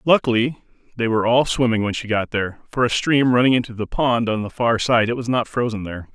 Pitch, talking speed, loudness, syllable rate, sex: 115 Hz, 245 wpm, -20 LUFS, 3.1 syllables/s, male